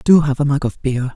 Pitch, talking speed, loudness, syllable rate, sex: 140 Hz, 315 wpm, -17 LUFS, 5.7 syllables/s, male